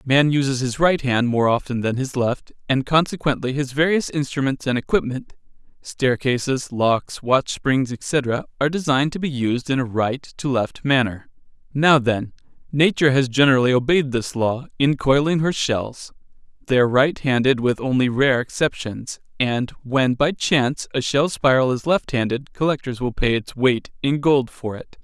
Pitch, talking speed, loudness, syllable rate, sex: 135 Hz, 170 wpm, -20 LUFS, 4.5 syllables/s, male